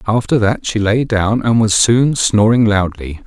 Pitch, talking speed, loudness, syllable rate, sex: 110 Hz, 185 wpm, -14 LUFS, 4.2 syllables/s, male